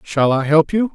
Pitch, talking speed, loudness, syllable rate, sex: 165 Hz, 255 wpm, -16 LUFS, 4.7 syllables/s, male